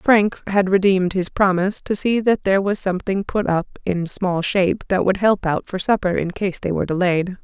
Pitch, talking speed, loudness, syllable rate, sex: 190 Hz, 220 wpm, -19 LUFS, 5.3 syllables/s, female